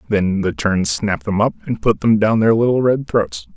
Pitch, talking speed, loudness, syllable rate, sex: 105 Hz, 235 wpm, -17 LUFS, 4.7 syllables/s, male